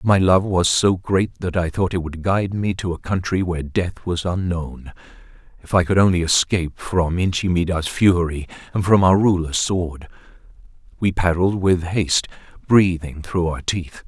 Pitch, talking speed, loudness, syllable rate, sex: 90 Hz, 175 wpm, -20 LUFS, 4.7 syllables/s, male